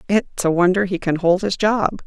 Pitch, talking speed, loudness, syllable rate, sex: 185 Hz, 230 wpm, -18 LUFS, 4.8 syllables/s, female